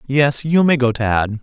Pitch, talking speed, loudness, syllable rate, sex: 130 Hz, 210 wpm, -16 LUFS, 3.9 syllables/s, male